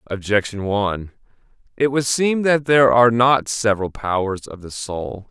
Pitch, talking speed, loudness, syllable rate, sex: 115 Hz, 160 wpm, -18 LUFS, 4.9 syllables/s, male